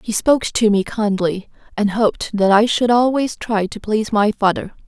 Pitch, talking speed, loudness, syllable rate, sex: 215 Hz, 195 wpm, -17 LUFS, 5.1 syllables/s, female